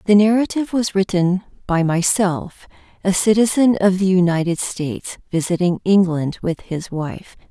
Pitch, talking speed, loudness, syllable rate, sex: 190 Hz, 130 wpm, -18 LUFS, 4.7 syllables/s, female